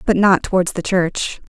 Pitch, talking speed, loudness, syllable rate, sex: 190 Hz, 200 wpm, -17 LUFS, 4.6 syllables/s, female